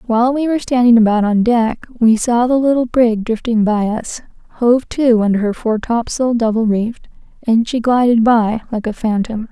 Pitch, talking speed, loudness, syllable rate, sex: 230 Hz, 190 wpm, -15 LUFS, 5.0 syllables/s, female